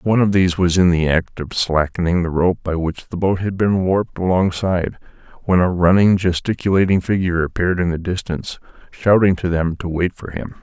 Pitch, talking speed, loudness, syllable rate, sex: 90 Hz, 200 wpm, -18 LUFS, 5.7 syllables/s, male